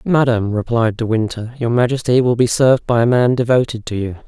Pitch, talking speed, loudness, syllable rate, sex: 120 Hz, 210 wpm, -16 LUFS, 5.9 syllables/s, male